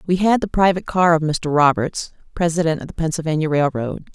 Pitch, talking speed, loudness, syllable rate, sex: 165 Hz, 190 wpm, -19 LUFS, 5.9 syllables/s, female